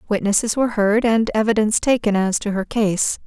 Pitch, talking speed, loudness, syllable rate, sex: 215 Hz, 185 wpm, -18 LUFS, 5.7 syllables/s, female